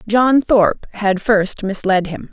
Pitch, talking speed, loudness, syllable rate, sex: 205 Hz, 155 wpm, -16 LUFS, 3.9 syllables/s, female